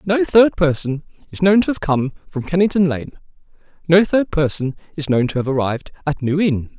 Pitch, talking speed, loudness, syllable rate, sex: 160 Hz, 195 wpm, -18 LUFS, 5.4 syllables/s, male